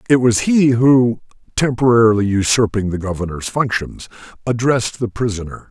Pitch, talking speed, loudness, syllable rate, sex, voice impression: 115 Hz, 125 wpm, -16 LUFS, 5.2 syllables/s, male, very masculine, very adult-like, very middle-aged, slightly old, very thick, very tensed, very powerful, bright, slightly soft, muffled, fluent, very cool, intellectual, sincere, very calm, very mature, slightly friendly, slightly reassuring, elegant, slightly wild, very lively, slightly strict, slightly intense